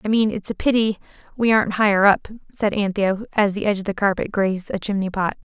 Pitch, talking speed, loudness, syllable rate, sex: 205 Hz, 225 wpm, -20 LUFS, 6.4 syllables/s, female